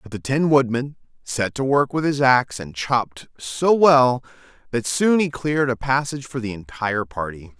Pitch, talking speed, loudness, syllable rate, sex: 130 Hz, 190 wpm, -20 LUFS, 4.9 syllables/s, male